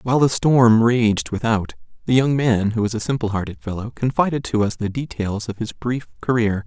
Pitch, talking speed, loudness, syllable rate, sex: 115 Hz, 205 wpm, -20 LUFS, 5.2 syllables/s, male